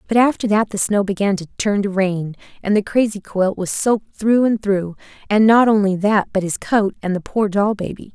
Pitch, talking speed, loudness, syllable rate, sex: 205 Hz, 230 wpm, -18 LUFS, 5.1 syllables/s, female